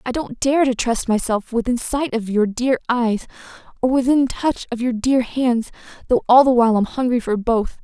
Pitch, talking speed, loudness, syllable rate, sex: 245 Hz, 200 wpm, -19 LUFS, 4.9 syllables/s, female